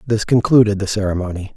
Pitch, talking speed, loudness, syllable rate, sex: 105 Hz, 155 wpm, -16 LUFS, 6.3 syllables/s, male